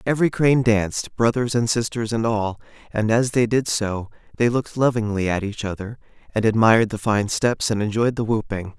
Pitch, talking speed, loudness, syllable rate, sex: 110 Hz, 190 wpm, -21 LUFS, 5.5 syllables/s, male